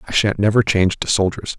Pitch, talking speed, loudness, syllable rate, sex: 105 Hz, 225 wpm, -17 LUFS, 6.3 syllables/s, male